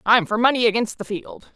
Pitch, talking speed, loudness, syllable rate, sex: 225 Hz, 230 wpm, -20 LUFS, 5.6 syllables/s, female